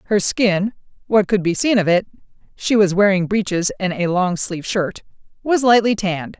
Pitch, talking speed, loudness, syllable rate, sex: 195 Hz, 170 wpm, -18 LUFS, 5.1 syllables/s, female